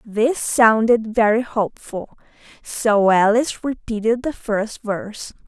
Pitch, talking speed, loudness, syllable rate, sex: 225 Hz, 110 wpm, -18 LUFS, 4.0 syllables/s, female